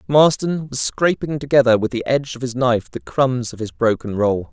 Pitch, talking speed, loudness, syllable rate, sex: 125 Hz, 210 wpm, -19 LUFS, 5.4 syllables/s, male